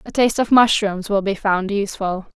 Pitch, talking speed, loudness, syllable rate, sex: 205 Hz, 200 wpm, -18 LUFS, 5.5 syllables/s, female